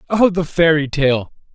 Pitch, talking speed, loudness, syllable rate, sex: 155 Hz, 155 wpm, -16 LUFS, 4.3 syllables/s, male